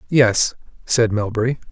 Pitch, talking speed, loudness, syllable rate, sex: 115 Hz, 105 wpm, -18 LUFS, 4.4 syllables/s, male